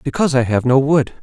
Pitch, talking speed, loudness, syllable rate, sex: 135 Hz, 245 wpm, -15 LUFS, 6.5 syllables/s, male